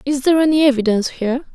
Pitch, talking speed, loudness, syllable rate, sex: 270 Hz, 195 wpm, -16 LUFS, 8.4 syllables/s, female